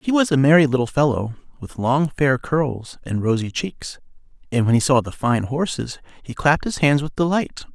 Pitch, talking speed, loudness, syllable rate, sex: 140 Hz, 200 wpm, -20 LUFS, 5.1 syllables/s, male